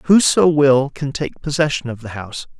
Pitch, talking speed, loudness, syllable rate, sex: 140 Hz, 185 wpm, -17 LUFS, 5.0 syllables/s, male